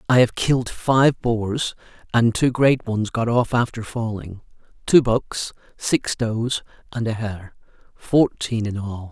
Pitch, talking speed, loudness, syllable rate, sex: 115 Hz, 150 wpm, -21 LUFS, 3.8 syllables/s, male